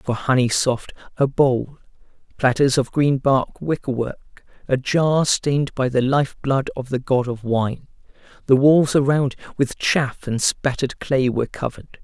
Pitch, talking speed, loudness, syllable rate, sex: 130 Hz, 155 wpm, -20 LUFS, 4.4 syllables/s, male